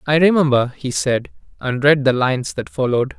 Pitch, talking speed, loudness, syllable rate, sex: 135 Hz, 170 wpm, -18 LUFS, 5.5 syllables/s, male